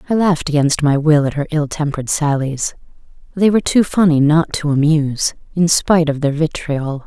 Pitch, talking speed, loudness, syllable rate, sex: 155 Hz, 185 wpm, -16 LUFS, 5.5 syllables/s, female